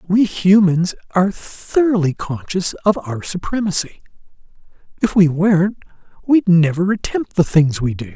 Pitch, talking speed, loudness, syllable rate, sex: 180 Hz, 130 wpm, -17 LUFS, 4.6 syllables/s, male